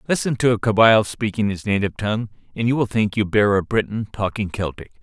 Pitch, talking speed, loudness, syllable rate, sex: 105 Hz, 215 wpm, -20 LUFS, 6.3 syllables/s, male